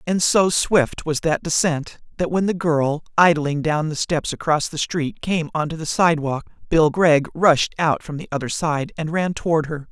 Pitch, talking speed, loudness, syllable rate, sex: 160 Hz, 200 wpm, -20 LUFS, 4.6 syllables/s, male